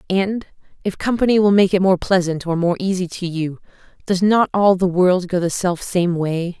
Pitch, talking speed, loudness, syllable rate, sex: 185 Hz, 210 wpm, -18 LUFS, 4.9 syllables/s, female